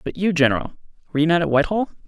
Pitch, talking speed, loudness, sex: 165 Hz, 230 wpm, -20 LUFS, male